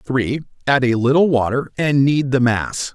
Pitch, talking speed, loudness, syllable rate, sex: 130 Hz, 185 wpm, -17 LUFS, 4.3 syllables/s, male